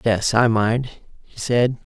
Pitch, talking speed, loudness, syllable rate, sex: 115 Hz, 155 wpm, -19 LUFS, 3.4 syllables/s, male